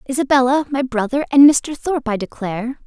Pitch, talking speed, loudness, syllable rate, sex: 260 Hz, 170 wpm, -17 LUFS, 5.8 syllables/s, female